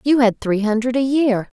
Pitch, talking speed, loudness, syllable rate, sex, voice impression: 240 Hz, 225 wpm, -18 LUFS, 4.9 syllables/s, female, feminine, adult-like, tensed, powerful, bright, clear, fluent, intellectual, calm, friendly, reassuring, elegant, lively, slightly sharp